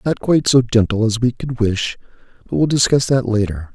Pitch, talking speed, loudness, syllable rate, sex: 120 Hz, 210 wpm, -17 LUFS, 5.4 syllables/s, male